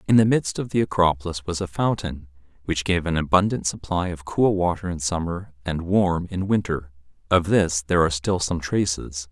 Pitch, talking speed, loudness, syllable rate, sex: 85 Hz, 195 wpm, -23 LUFS, 5.2 syllables/s, male